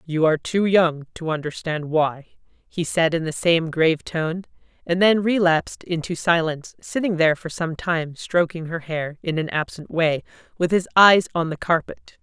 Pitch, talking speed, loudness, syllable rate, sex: 165 Hz, 180 wpm, -21 LUFS, 4.8 syllables/s, female